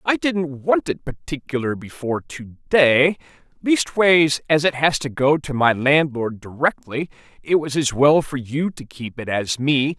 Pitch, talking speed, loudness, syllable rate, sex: 145 Hz, 175 wpm, -19 LUFS, 4.2 syllables/s, male